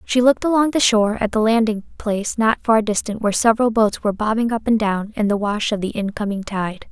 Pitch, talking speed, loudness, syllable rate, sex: 215 Hz, 235 wpm, -19 LUFS, 6.1 syllables/s, female